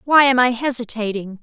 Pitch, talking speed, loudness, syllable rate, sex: 240 Hz, 170 wpm, -17 LUFS, 5.3 syllables/s, female